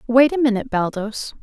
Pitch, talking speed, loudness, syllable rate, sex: 240 Hz, 170 wpm, -19 LUFS, 5.7 syllables/s, female